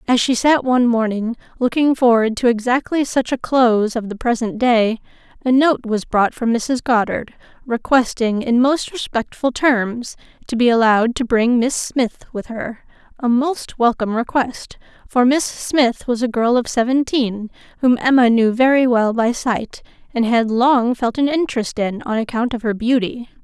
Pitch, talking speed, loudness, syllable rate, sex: 240 Hz, 175 wpm, -17 LUFS, 4.6 syllables/s, female